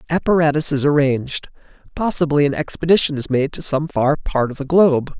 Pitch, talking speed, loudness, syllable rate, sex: 150 Hz, 175 wpm, -18 LUFS, 5.7 syllables/s, male